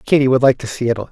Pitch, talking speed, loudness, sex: 125 Hz, 325 wpm, -15 LUFS, male